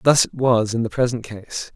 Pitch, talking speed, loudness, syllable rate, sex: 120 Hz, 240 wpm, -20 LUFS, 4.9 syllables/s, male